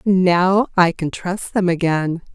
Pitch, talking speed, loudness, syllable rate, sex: 180 Hz, 155 wpm, -18 LUFS, 3.3 syllables/s, female